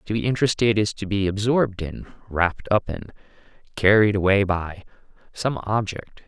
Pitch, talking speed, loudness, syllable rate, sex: 100 Hz, 155 wpm, -22 LUFS, 5.4 syllables/s, male